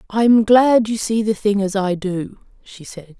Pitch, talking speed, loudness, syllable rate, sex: 205 Hz, 225 wpm, -17 LUFS, 4.4 syllables/s, female